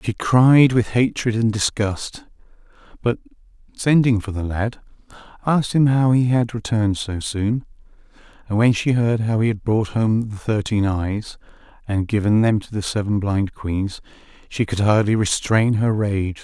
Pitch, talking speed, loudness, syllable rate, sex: 110 Hz, 165 wpm, -20 LUFS, 4.4 syllables/s, male